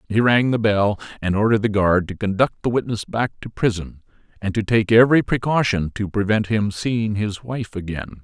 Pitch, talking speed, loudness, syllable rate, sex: 105 Hz, 195 wpm, -20 LUFS, 5.3 syllables/s, male